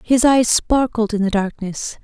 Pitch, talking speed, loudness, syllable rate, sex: 225 Hz, 175 wpm, -17 LUFS, 4.2 syllables/s, female